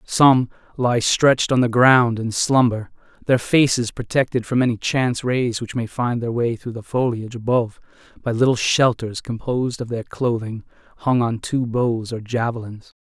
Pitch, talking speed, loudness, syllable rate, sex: 120 Hz, 170 wpm, -20 LUFS, 4.8 syllables/s, male